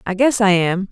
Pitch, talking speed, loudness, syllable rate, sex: 200 Hz, 265 wpm, -16 LUFS, 5.1 syllables/s, female